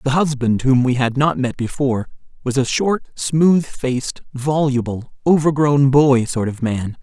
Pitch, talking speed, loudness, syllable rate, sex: 135 Hz, 160 wpm, -18 LUFS, 4.2 syllables/s, male